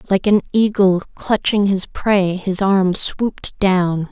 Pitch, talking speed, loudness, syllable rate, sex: 195 Hz, 145 wpm, -17 LUFS, 3.6 syllables/s, female